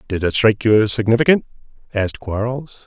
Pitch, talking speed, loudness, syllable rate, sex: 115 Hz, 170 wpm, -17 LUFS, 6.3 syllables/s, male